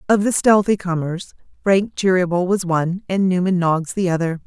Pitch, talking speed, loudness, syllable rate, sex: 185 Hz, 175 wpm, -18 LUFS, 5.1 syllables/s, female